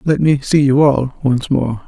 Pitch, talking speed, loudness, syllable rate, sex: 135 Hz, 225 wpm, -14 LUFS, 4.2 syllables/s, male